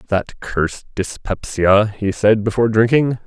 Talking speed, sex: 130 wpm, male